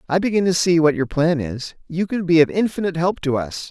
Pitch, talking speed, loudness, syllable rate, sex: 160 Hz, 260 wpm, -19 LUFS, 5.9 syllables/s, male